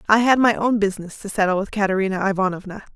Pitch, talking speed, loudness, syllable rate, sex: 200 Hz, 205 wpm, -20 LUFS, 7.1 syllables/s, female